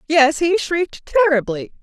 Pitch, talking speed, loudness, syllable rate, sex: 315 Hz, 130 wpm, -17 LUFS, 5.0 syllables/s, female